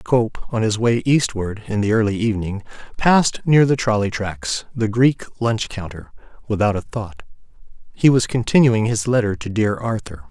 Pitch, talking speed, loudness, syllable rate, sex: 110 Hz, 170 wpm, -19 LUFS, 4.8 syllables/s, male